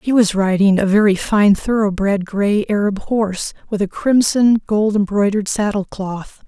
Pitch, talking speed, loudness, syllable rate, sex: 205 Hz, 150 wpm, -16 LUFS, 4.6 syllables/s, female